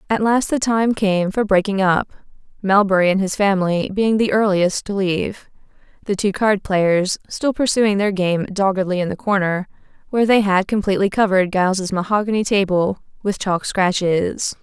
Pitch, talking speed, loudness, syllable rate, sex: 195 Hz, 165 wpm, -18 LUFS, 5.0 syllables/s, female